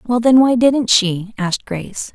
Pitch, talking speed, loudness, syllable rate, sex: 225 Hz, 195 wpm, -15 LUFS, 4.5 syllables/s, female